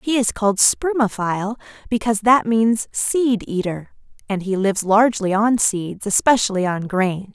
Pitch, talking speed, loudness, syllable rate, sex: 215 Hz, 145 wpm, -19 LUFS, 4.8 syllables/s, female